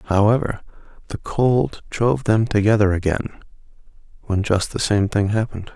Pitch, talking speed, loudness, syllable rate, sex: 105 Hz, 135 wpm, -20 LUFS, 4.8 syllables/s, male